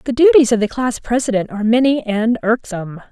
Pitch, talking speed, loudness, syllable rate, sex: 235 Hz, 195 wpm, -16 LUFS, 5.9 syllables/s, female